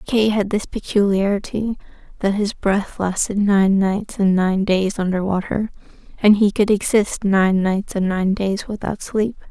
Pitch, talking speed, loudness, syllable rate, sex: 200 Hz, 165 wpm, -19 LUFS, 4.1 syllables/s, female